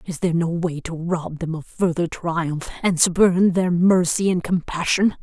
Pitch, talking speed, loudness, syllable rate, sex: 170 Hz, 185 wpm, -21 LUFS, 4.2 syllables/s, female